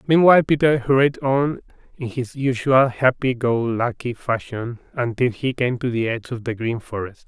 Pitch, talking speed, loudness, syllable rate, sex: 125 Hz, 175 wpm, -20 LUFS, 4.8 syllables/s, male